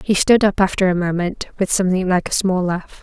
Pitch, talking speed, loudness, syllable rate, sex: 185 Hz, 260 wpm, -18 LUFS, 5.4 syllables/s, female